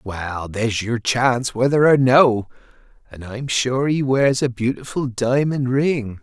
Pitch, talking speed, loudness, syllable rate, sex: 125 Hz, 155 wpm, -19 LUFS, 4.0 syllables/s, male